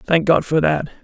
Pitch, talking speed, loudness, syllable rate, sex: 140 Hz, 235 wpm, -17 LUFS, 5.2 syllables/s, male